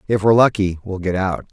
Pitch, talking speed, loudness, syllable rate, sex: 100 Hz, 275 wpm, -17 LUFS, 7.1 syllables/s, male